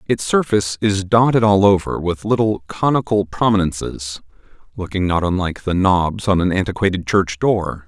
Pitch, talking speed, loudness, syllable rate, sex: 100 Hz, 150 wpm, -17 LUFS, 5.0 syllables/s, male